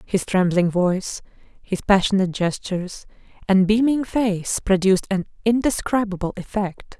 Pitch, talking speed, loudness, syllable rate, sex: 195 Hz, 110 wpm, -21 LUFS, 4.8 syllables/s, female